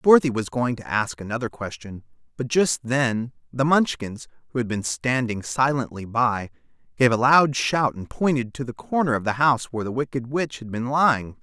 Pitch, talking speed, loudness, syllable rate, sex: 125 Hz, 195 wpm, -23 LUFS, 5.1 syllables/s, male